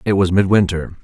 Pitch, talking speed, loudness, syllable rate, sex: 95 Hz, 175 wpm, -16 LUFS, 6.0 syllables/s, male